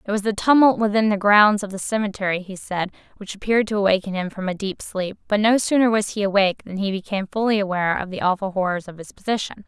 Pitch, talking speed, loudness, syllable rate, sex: 200 Hz, 240 wpm, -21 LUFS, 6.6 syllables/s, female